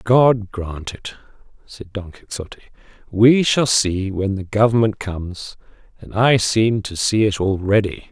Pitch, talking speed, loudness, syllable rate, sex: 105 Hz, 150 wpm, -18 LUFS, 4.7 syllables/s, male